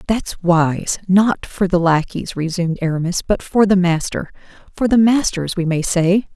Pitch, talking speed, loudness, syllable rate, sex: 185 Hz, 150 wpm, -17 LUFS, 4.5 syllables/s, female